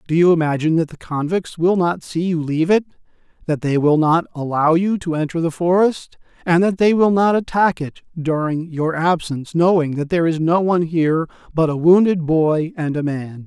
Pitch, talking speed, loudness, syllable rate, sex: 165 Hz, 205 wpm, -18 LUFS, 5.3 syllables/s, male